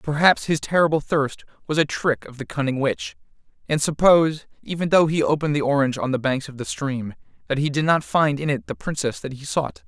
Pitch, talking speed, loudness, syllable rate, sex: 145 Hz, 225 wpm, -22 LUFS, 5.7 syllables/s, male